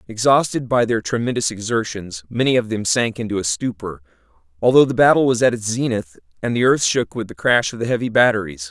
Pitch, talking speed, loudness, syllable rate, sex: 110 Hz, 205 wpm, -18 LUFS, 5.9 syllables/s, male